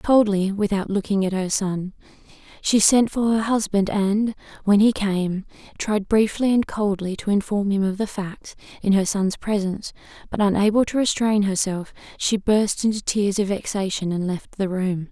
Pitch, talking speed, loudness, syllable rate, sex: 200 Hz, 175 wpm, -22 LUFS, 4.6 syllables/s, female